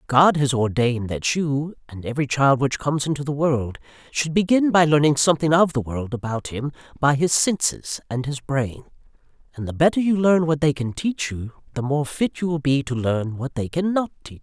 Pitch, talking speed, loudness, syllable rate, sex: 145 Hz, 215 wpm, -21 LUFS, 5.3 syllables/s, male